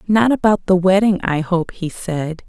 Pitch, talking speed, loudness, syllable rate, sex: 185 Hz, 195 wpm, -17 LUFS, 4.5 syllables/s, female